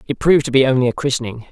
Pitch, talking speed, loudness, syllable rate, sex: 130 Hz, 275 wpm, -16 LUFS, 8.2 syllables/s, male